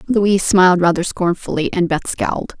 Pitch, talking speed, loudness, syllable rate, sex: 185 Hz, 160 wpm, -16 LUFS, 5.4 syllables/s, female